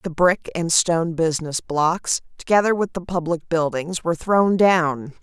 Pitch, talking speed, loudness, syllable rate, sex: 170 Hz, 160 wpm, -20 LUFS, 4.4 syllables/s, female